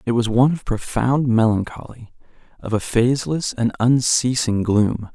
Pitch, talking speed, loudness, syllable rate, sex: 120 Hz, 130 wpm, -19 LUFS, 4.7 syllables/s, male